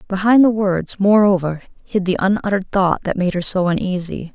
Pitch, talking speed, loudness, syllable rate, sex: 190 Hz, 180 wpm, -17 LUFS, 5.3 syllables/s, female